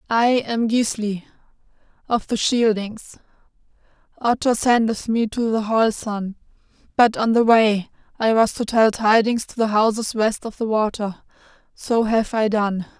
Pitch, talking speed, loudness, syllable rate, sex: 220 Hz, 150 wpm, -20 LUFS, 4.2 syllables/s, female